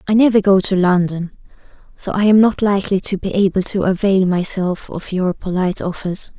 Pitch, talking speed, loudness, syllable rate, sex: 190 Hz, 190 wpm, -17 LUFS, 5.4 syllables/s, female